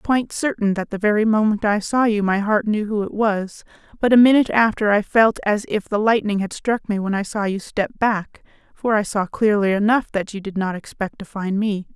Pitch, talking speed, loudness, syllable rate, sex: 210 Hz, 240 wpm, -20 LUFS, 5.5 syllables/s, female